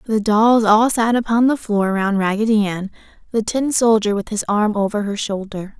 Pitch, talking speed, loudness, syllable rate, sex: 215 Hz, 195 wpm, -17 LUFS, 5.0 syllables/s, female